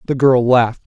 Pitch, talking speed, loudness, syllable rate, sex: 125 Hz, 180 wpm, -14 LUFS, 6.0 syllables/s, male